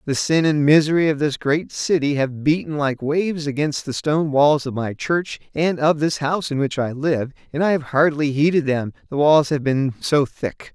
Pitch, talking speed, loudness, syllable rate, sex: 145 Hz, 220 wpm, -20 LUFS, 4.9 syllables/s, male